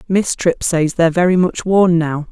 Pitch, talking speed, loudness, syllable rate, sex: 170 Hz, 205 wpm, -15 LUFS, 4.7 syllables/s, female